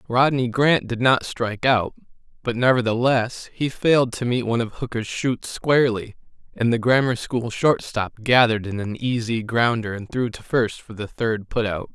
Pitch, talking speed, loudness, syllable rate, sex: 120 Hz, 180 wpm, -21 LUFS, 4.8 syllables/s, male